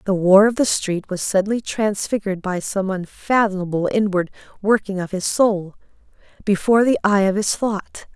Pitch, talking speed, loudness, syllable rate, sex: 200 Hz, 160 wpm, -19 LUFS, 5.1 syllables/s, female